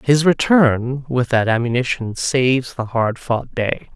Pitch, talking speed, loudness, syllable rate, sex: 125 Hz, 150 wpm, -18 LUFS, 3.9 syllables/s, male